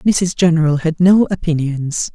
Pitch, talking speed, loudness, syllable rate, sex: 165 Hz, 140 wpm, -15 LUFS, 4.4 syllables/s, female